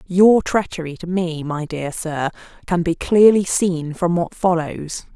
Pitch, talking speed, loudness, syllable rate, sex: 175 Hz, 165 wpm, -19 LUFS, 3.9 syllables/s, female